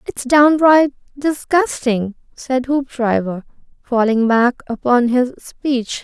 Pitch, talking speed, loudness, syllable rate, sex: 255 Hz, 100 wpm, -16 LUFS, 3.4 syllables/s, female